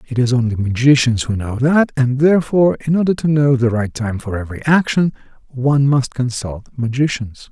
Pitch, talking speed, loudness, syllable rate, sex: 130 Hz, 185 wpm, -16 LUFS, 5.6 syllables/s, male